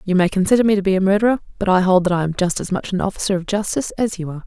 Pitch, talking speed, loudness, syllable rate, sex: 190 Hz, 325 wpm, -18 LUFS, 8.0 syllables/s, female